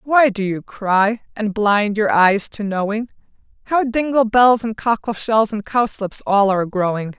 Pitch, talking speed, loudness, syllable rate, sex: 215 Hz, 175 wpm, -18 LUFS, 4.3 syllables/s, female